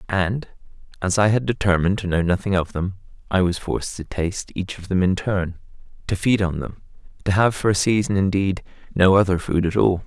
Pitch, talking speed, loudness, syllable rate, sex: 95 Hz, 210 wpm, -21 LUFS, 5.6 syllables/s, male